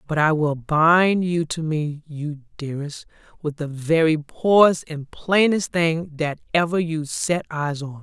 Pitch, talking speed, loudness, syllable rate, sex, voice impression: 160 Hz, 165 wpm, -21 LUFS, 3.9 syllables/s, female, feminine, adult-like, slightly thick, tensed, powerful, clear, intellectual, calm, reassuring, elegant, lively, slightly strict, slightly sharp